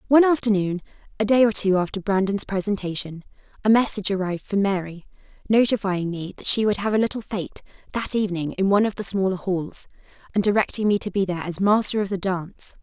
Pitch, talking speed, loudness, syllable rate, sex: 195 Hz, 195 wpm, -22 LUFS, 6.4 syllables/s, female